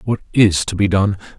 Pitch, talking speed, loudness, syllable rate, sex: 100 Hz, 215 wpm, -16 LUFS, 5.2 syllables/s, male